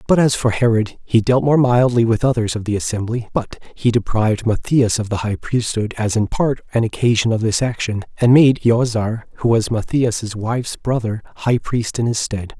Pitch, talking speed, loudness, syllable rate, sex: 115 Hz, 200 wpm, -18 LUFS, 4.8 syllables/s, male